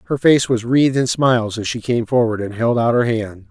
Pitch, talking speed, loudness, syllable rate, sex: 120 Hz, 255 wpm, -17 LUFS, 5.5 syllables/s, male